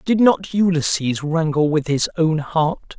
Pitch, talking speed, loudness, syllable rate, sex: 160 Hz, 160 wpm, -19 LUFS, 3.8 syllables/s, male